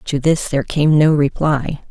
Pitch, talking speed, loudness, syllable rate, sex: 145 Hz, 190 wpm, -16 LUFS, 4.6 syllables/s, female